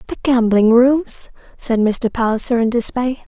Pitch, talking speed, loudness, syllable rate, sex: 240 Hz, 145 wpm, -16 LUFS, 4.3 syllables/s, female